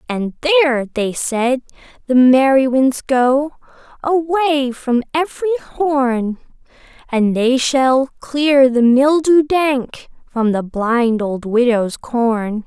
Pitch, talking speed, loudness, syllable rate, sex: 260 Hz, 120 wpm, -16 LUFS, 3.2 syllables/s, female